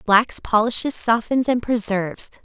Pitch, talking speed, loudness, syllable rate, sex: 225 Hz, 125 wpm, -19 LUFS, 4.5 syllables/s, female